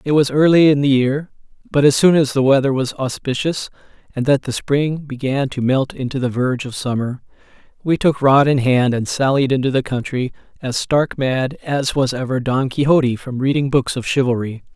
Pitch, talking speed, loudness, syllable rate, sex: 135 Hz, 200 wpm, -17 LUFS, 5.2 syllables/s, male